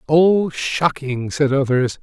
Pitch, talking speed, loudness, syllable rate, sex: 145 Hz, 120 wpm, -18 LUFS, 3.2 syllables/s, male